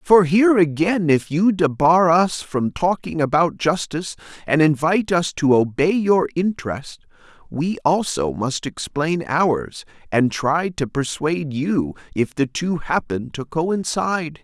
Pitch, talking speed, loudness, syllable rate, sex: 160 Hz, 140 wpm, -20 LUFS, 4.1 syllables/s, male